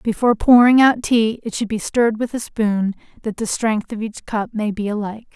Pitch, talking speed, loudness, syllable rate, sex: 220 Hz, 225 wpm, -18 LUFS, 5.4 syllables/s, female